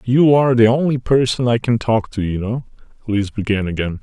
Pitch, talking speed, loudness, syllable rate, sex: 115 Hz, 210 wpm, -17 LUFS, 5.4 syllables/s, male